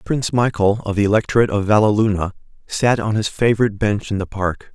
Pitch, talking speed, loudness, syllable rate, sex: 105 Hz, 190 wpm, -18 LUFS, 6.3 syllables/s, male